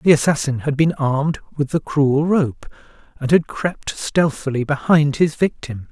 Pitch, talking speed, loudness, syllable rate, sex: 145 Hz, 160 wpm, -19 LUFS, 4.4 syllables/s, male